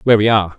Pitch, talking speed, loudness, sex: 105 Hz, 305 wpm, -13 LUFS, male